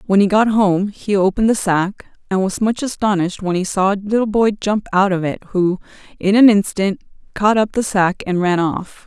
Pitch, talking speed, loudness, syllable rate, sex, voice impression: 200 Hz, 220 wpm, -17 LUFS, 5.2 syllables/s, female, feminine, adult-like, slightly clear, slightly intellectual, calm, slightly elegant